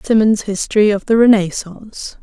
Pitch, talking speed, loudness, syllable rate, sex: 210 Hz, 135 wpm, -14 LUFS, 5.4 syllables/s, female